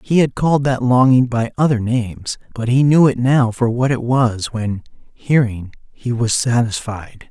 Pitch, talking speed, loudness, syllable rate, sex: 120 Hz, 180 wpm, -16 LUFS, 4.5 syllables/s, male